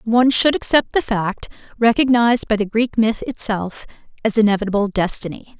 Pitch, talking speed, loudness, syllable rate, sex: 220 Hz, 150 wpm, -17 LUFS, 5.5 syllables/s, female